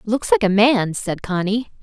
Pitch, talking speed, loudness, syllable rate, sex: 215 Hz, 195 wpm, -18 LUFS, 4.3 syllables/s, female